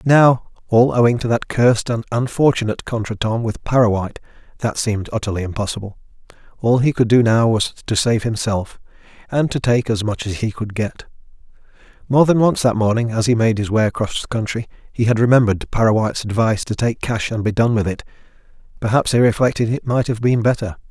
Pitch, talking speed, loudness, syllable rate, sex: 115 Hz, 180 wpm, -18 LUFS, 5.9 syllables/s, male